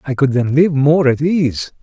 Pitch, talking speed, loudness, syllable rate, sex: 140 Hz, 230 wpm, -14 LUFS, 4.4 syllables/s, male